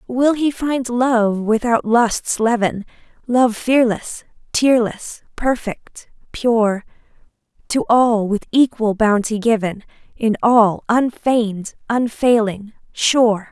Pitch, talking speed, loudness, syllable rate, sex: 230 Hz, 100 wpm, -17 LUFS, 3.3 syllables/s, female